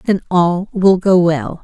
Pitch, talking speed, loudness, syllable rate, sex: 175 Hz, 185 wpm, -14 LUFS, 3.4 syllables/s, female